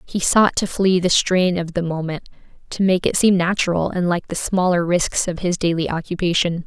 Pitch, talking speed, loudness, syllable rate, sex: 175 Hz, 205 wpm, -19 LUFS, 5.1 syllables/s, female